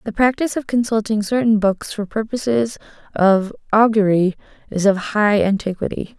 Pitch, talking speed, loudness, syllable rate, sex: 215 Hz, 135 wpm, -18 LUFS, 5.0 syllables/s, female